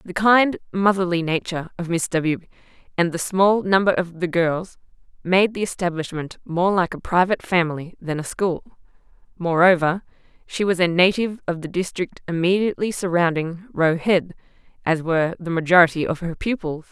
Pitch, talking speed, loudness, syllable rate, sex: 175 Hz, 155 wpm, -21 LUFS, 5.2 syllables/s, female